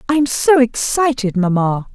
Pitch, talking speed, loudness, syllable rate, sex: 240 Hz, 125 wpm, -15 LUFS, 4.0 syllables/s, female